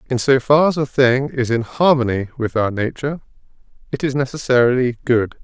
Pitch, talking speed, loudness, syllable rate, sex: 130 Hz, 175 wpm, -17 LUFS, 5.6 syllables/s, male